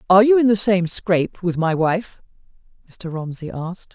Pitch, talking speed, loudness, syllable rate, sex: 185 Hz, 185 wpm, -19 LUFS, 5.2 syllables/s, female